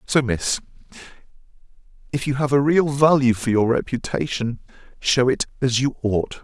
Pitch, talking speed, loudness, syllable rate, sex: 130 Hz, 150 wpm, -20 LUFS, 4.8 syllables/s, male